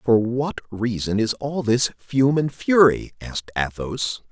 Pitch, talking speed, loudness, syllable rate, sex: 120 Hz, 155 wpm, -21 LUFS, 3.8 syllables/s, male